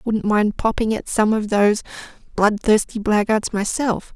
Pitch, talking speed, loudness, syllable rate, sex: 215 Hz, 145 wpm, -19 LUFS, 4.6 syllables/s, female